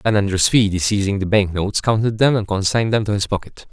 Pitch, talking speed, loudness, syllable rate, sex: 100 Hz, 225 wpm, -18 LUFS, 6.4 syllables/s, male